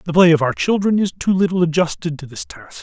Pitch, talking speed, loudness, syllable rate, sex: 170 Hz, 255 wpm, -17 LUFS, 6.0 syllables/s, male